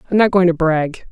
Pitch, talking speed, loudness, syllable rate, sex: 175 Hz, 270 wpm, -15 LUFS, 5.7 syllables/s, female